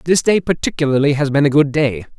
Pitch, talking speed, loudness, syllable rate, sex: 145 Hz, 220 wpm, -16 LUFS, 6.2 syllables/s, male